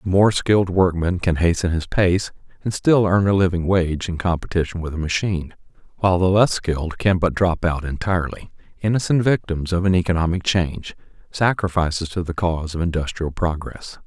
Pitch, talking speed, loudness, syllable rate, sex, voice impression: 90 Hz, 175 wpm, -20 LUFS, 5.5 syllables/s, male, very masculine, very adult-like, middle-aged, very thick, slightly relaxed, powerful, dark, slightly soft, muffled, fluent, very cool, very intellectual, sincere, very calm, very mature, very friendly, very reassuring, unique, elegant, slightly wild, sweet, kind, slightly modest